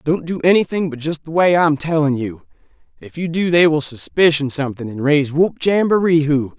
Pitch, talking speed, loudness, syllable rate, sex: 155 Hz, 200 wpm, -17 LUFS, 5.6 syllables/s, male